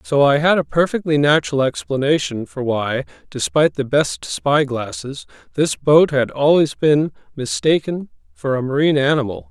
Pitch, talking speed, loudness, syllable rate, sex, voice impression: 145 Hz, 145 wpm, -18 LUFS, 4.9 syllables/s, male, masculine, middle-aged, slightly relaxed, powerful, hard, raspy, mature, wild, lively, strict, intense, sharp